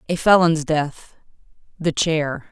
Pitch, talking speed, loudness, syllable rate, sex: 160 Hz, 95 wpm, -19 LUFS, 3.6 syllables/s, female